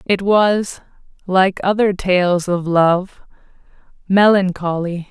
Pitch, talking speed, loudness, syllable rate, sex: 185 Hz, 95 wpm, -16 LUFS, 3.3 syllables/s, female